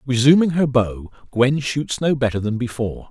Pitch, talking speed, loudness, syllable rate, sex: 130 Hz, 175 wpm, -19 LUFS, 5.0 syllables/s, male